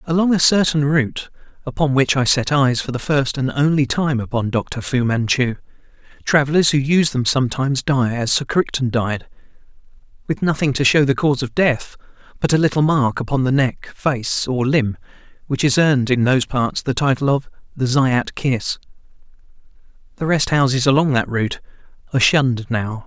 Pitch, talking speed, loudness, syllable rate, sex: 135 Hz, 170 wpm, -18 LUFS, 5.3 syllables/s, male